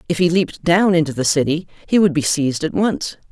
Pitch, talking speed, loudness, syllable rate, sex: 165 Hz, 235 wpm, -17 LUFS, 5.8 syllables/s, female